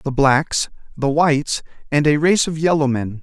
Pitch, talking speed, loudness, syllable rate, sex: 145 Hz, 185 wpm, -18 LUFS, 4.5 syllables/s, male